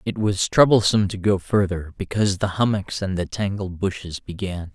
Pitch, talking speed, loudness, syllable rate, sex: 95 Hz, 175 wpm, -22 LUFS, 5.3 syllables/s, male